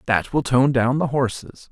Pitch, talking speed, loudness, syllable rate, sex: 130 Hz, 210 wpm, -20 LUFS, 4.5 syllables/s, male